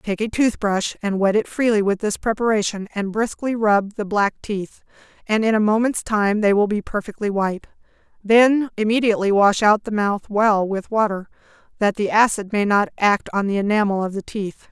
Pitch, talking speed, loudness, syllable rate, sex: 210 Hz, 190 wpm, -20 LUFS, 5.1 syllables/s, female